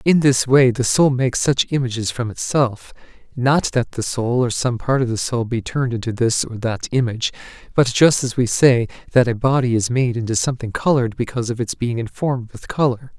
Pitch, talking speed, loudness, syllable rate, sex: 120 Hz, 215 wpm, -19 LUFS, 5.5 syllables/s, male